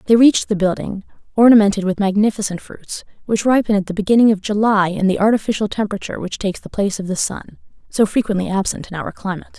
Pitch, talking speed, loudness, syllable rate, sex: 205 Hz, 200 wpm, -17 LUFS, 6.8 syllables/s, female